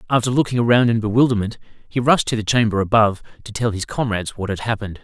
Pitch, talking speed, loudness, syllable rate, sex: 110 Hz, 215 wpm, -19 LUFS, 7.1 syllables/s, male